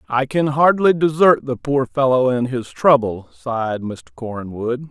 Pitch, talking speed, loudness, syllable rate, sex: 130 Hz, 160 wpm, -18 LUFS, 4.2 syllables/s, male